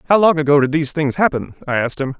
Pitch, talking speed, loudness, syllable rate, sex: 150 Hz, 275 wpm, -17 LUFS, 7.8 syllables/s, male